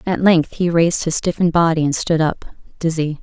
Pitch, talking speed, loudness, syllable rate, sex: 165 Hz, 205 wpm, -17 LUFS, 5.8 syllables/s, female